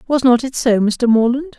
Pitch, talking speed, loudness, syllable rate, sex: 250 Hz, 225 wpm, -15 LUFS, 4.9 syllables/s, female